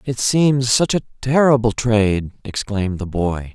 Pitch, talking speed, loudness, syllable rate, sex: 115 Hz, 150 wpm, -18 LUFS, 4.4 syllables/s, male